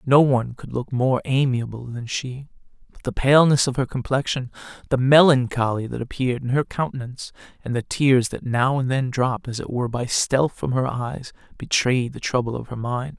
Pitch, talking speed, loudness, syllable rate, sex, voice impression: 130 Hz, 195 wpm, -22 LUFS, 5.3 syllables/s, male, masculine, adult-like, slightly cool, sincere, friendly